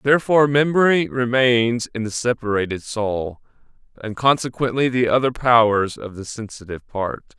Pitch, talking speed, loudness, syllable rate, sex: 120 Hz, 130 wpm, -19 LUFS, 5.0 syllables/s, male